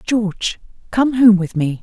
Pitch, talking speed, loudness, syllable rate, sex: 210 Hz, 165 wpm, -16 LUFS, 4.3 syllables/s, female